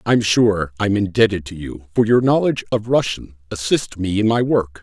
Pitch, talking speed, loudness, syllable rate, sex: 100 Hz, 200 wpm, -18 LUFS, 5.1 syllables/s, male